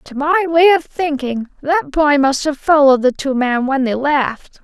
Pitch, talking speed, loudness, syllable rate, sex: 285 Hz, 205 wpm, -15 LUFS, 4.4 syllables/s, female